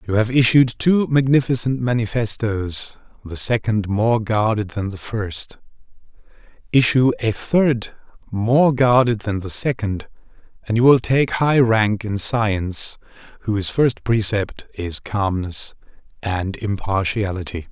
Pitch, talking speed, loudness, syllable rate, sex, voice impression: 110 Hz, 120 wpm, -19 LUFS, 4.0 syllables/s, male, very masculine, very middle-aged, very thick, tensed, very powerful, bright, soft, clear, fluent, slightly raspy, very cool, intellectual, slightly refreshing, sincere, very calm, mature, very friendly, very reassuring, unique, slightly elegant, wild, slightly sweet, lively, kind, slightly modest